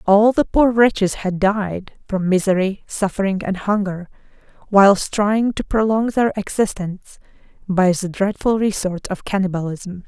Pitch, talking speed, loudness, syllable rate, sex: 200 Hz, 135 wpm, -18 LUFS, 4.6 syllables/s, female